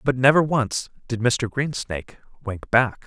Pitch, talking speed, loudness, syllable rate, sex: 120 Hz, 155 wpm, -22 LUFS, 4.4 syllables/s, male